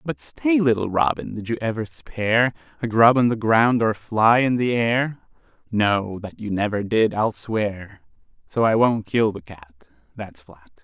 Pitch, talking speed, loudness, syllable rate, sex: 105 Hz, 190 wpm, -21 LUFS, 4.3 syllables/s, male